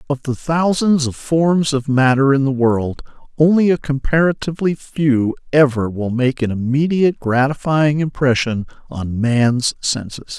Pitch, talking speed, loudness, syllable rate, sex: 140 Hz, 140 wpm, -17 LUFS, 4.4 syllables/s, male